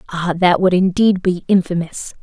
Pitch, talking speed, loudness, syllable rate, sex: 180 Hz, 160 wpm, -16 LUFS, 4.9 syllables/s, female